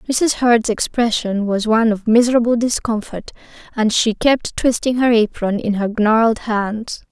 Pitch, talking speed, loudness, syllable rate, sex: 225 Hz, 150 wpm, -17 LUFS, 4.6 syllables/s, female